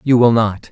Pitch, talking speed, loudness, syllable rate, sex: 115 Hz, 255 wpm, -14 LUFS, 4.9 syllables/s, male